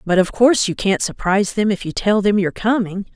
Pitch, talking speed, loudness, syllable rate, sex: 200 Hz, 250 wpm, -17 LUFS, 6.0 syllables/s, female